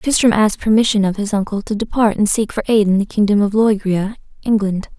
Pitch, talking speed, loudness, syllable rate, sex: 210 Hz, 215 wpm, -16 LUFS, 6.2 syllables/s, female